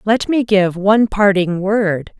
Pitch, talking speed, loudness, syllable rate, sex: 200 Hz, 165 wpm, -15 LUFS, 3.9 syllables/s, female